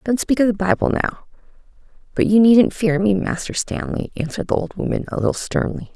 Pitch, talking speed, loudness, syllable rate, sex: 210 Hz, 200 wpm, -19 LUFS, 6.1 syllables/s, female